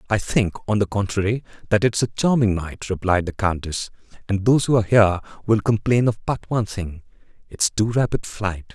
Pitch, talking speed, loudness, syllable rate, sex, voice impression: 105 Hz, 190 wpm, -21 LUFS, 5.7 syllables/s, male, very masculine, very adult-like, slightly thick, cool, calm, wild